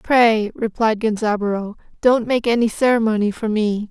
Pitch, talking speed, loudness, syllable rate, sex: 220 Hz, 140 wpm, -18 LUFS, 4.8 syllables/s, female